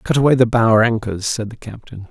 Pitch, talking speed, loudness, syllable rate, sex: 115 Hz, 230 wpm, -16 LUFS, 6.0 syllables/s, male